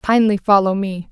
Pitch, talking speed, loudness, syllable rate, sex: 200 Hz, 160 wpm, -16 LUFS, 4.7 syllables/s, female